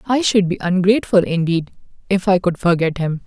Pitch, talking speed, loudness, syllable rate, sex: 180 Hz, 185 wpm, -17 LUFS, 5.4 syllables/s, male